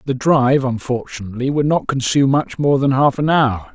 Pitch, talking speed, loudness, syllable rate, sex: 135 Hz, 190 wpm, -17 LUFS, 5.6 syllables/s, male